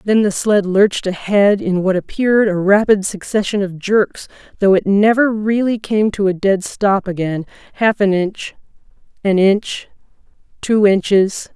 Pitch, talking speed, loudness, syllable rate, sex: 200 Hz, 145 wpm, -15 LUFS, 4.4 syllables/s, female